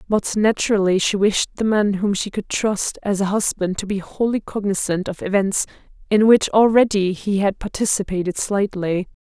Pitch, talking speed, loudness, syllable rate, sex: 200 Hz, 170 wpm, -19 LUFS, 4.9 syllables/s, female